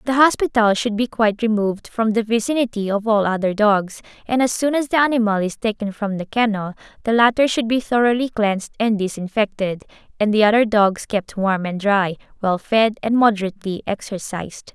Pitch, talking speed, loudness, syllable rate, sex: 215 Hz, 185 wpm, -19 LUFS, 5.5 syllables/s, female